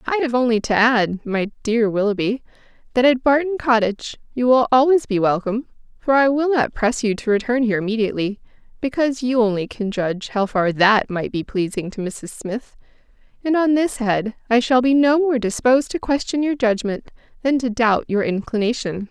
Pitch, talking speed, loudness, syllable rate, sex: 235 Hz, 190 wpm, -19 LUFS, 5.4 syllables/s, female